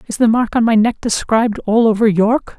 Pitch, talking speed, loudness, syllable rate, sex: 225 Hz, 230 wpm, -14 LUFS, 5.4 syllables/s, female